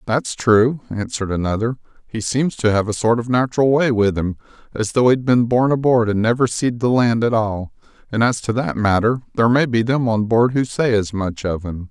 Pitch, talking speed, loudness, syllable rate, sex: 115 Hz, 225 wpm, -18 LUFS, 5.3 syllables/s, male